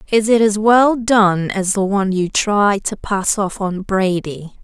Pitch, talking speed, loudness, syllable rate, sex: 200 Hz, 195 wpm, -16 LUFS, 3.9 syllables/s, female